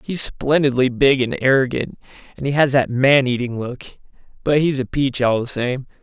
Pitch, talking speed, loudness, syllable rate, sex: 130 Hz, 180 wpm, -18 LUFS, 4.6 syllables/s, male